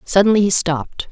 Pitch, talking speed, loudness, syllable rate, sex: 185 Hz, 160 wpm, -16 LUFS, 5.9 syllables/s, female